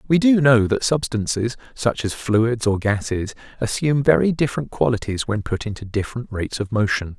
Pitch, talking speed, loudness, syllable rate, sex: 115 Hz, 175 wpm, -20 LUFS, 5.5 syllables/s, male